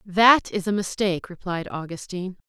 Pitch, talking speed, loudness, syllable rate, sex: 185 Hz, 145 wpm, -23 LUFS, 5.2 syllables/s, female